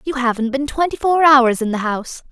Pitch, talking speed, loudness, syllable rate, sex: 260 Hz, 235 wpm, -16 LUFS, 5.6 syllables/s, female